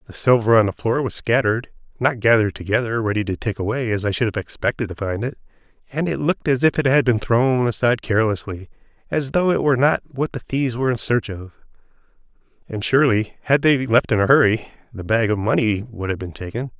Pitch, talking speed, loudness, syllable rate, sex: 115 Hz, 220 wpm, -20 LUFS, 6.2 syllables/s, male